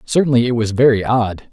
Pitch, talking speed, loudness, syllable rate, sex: 120 Hz, 195 wpm, -15 LUFS, 5.7 syllables/s, male